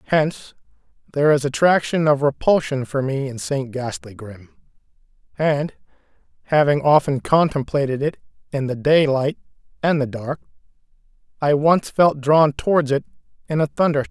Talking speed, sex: 145 wpm, male